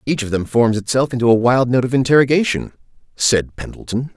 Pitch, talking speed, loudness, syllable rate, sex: 125 Hz, 190 wpm, -16 LUFS, 5.9 syllables/s, male